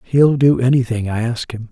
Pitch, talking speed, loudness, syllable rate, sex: 125 Hz, 210 wpm, -16 LUFS, 5.0 syllables/s, male